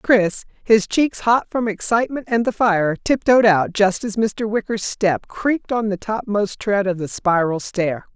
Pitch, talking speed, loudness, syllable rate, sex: 210 Hz, 185 wpm, -19 LUFS, 4.2 syllables/s, female